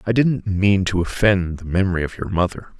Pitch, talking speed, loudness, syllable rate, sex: 95 Hz, 215 wpm, -20 LUFS, 5.4 syllables/s, male